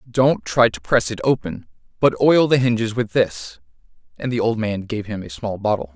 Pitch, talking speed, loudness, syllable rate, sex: 115 Hz, 210 wpm, -20 LUFS, 5.0 syllables/s, male